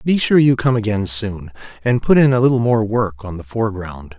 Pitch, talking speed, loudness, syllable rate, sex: 110 Hz, 230 wpm, -16 LUFS, 5.3 syllables/s, male